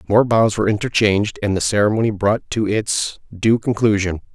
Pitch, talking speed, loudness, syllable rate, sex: 105 Hz, 165 wpm, -18 LUFS, 5.4 syllables/s, male